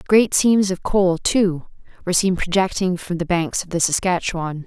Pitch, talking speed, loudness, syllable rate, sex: 180 Hz, 180 wpm, -19 LUFS, 4.9 syllables/s, female